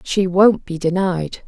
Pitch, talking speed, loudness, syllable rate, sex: 180 Hz, 165 wpm, -17 LUFS, 3.7 syllables/s, female